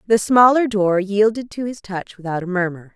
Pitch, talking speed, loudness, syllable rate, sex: 205 Hz, 205 wpm, -18 LUFS, 5.1 syllables/s, female